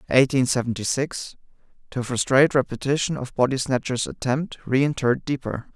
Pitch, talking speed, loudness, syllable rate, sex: 130 Hz, 115 wpm, -23 LUFS, 5.3 syllables/s, male